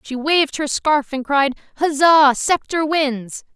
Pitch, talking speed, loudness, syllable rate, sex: 290 Hz, 150 wpm, -17 LUFS, 3.9 syllables/s, female